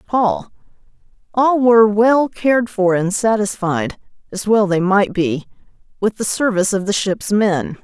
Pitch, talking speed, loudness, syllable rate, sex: 205 Hz, 155 wpm, -16 LUFS, 4.4 syllables/s, female